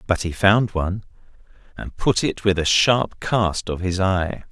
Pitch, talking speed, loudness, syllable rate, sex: 95 Hz, 185 wpm, -20 LUFS, 4.1 syllables/s, male